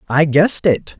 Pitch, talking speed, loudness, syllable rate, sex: 155 Hz, 180 wpm, -15 LUFS, 4.9 syllables/s, male